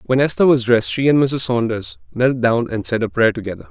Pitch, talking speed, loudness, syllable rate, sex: 125 Hz, 245 wpm, -17 LUFS, 5.9 syllables/s, male